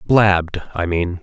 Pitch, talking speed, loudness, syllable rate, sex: 95 Hz, 145 wpm, -18 LUFS, 4.1 syllables/s, male